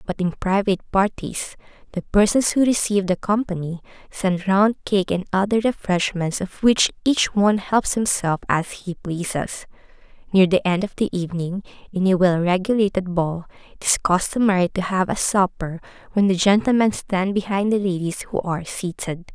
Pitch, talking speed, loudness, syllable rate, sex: 190 Hz, 165 wpm, -21 LUFS, 5.0 syllables/s, female